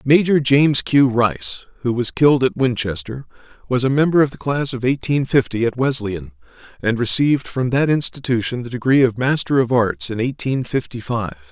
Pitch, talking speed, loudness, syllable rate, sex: 125 Hz, 180 wpm, -18 LUFS, 5.3 syllables/s, male